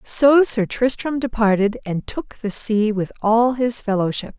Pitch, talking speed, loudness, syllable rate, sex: 225 Hz, 165 wpm, -19 LUFS, 4.1 syllables/s, female